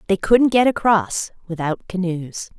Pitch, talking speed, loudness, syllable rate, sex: 190 Hz, 140 wpm, -19 LUFS, 4.2 syllables/s, female